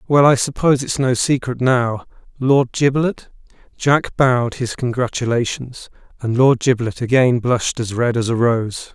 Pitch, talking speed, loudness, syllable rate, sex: 125 Hz, 155 wpm, -17 LUFS, 4.6 syllables/s, male